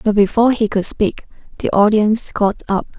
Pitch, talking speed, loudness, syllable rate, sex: 210 Hz, 180 wpm, -16 LUFS, 5.4 syllables/s, female